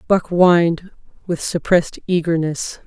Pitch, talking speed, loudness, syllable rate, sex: 170 Hz, 105 wpm, -18 LUFS, 4.6 syllables/s, female